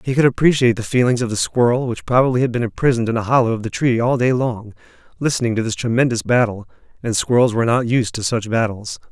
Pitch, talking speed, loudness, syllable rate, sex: 120 Hz, 230 wpm, -18 LUFS, 6.7 syllables/s, male